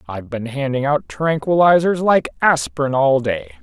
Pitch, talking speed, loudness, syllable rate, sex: 135 Hz, 150 wpm, -17 LUFS, 4.9 syllables/s, male